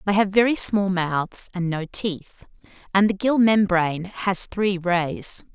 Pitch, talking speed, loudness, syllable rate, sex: 190 Hz, 160 wpm, -21 LUFS, 3.7 syllables/s, female